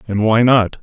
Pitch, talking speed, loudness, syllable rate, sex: 110 Hz, 220 wpm, -13 LUFS, 4.5 syllables/s, male